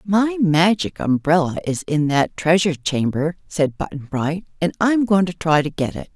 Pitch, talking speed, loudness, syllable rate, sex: 170 Hz, 185 wpm, -19 LUFS, 4.6 syllables/s, female